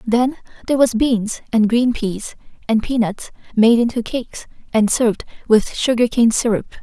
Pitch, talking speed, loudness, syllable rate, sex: 230 Hz, 150 wpm, -17 LUFS, 5.1 syllables/s, female